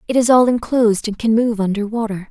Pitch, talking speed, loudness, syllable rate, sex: 225 Hz, 235 wpm, -16 LUFS, 6.1 syllables/s, female